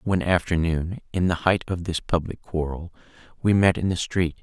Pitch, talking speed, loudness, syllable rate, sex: 90 Hz, 190 wpm, -24 LUFS, 5.2 syllables/s, male